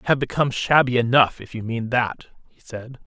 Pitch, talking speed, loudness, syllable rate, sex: 120 Hz, 210 wpm, -20 LUFS, 5.5 syllables/s, male